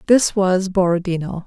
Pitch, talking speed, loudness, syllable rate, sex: 185 Hz, 125 wpm, -18 LUFS, 4.7 syllables/s, female